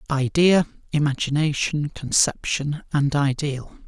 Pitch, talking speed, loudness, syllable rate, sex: 145 Hz, 75 wpm, -22 LUFS, 3.9 syllables/s, male